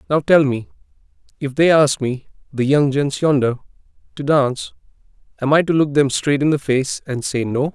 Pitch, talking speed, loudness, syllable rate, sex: 140 Hz, 195 wpm, -18 LUFS, 5.1 syllables/s, male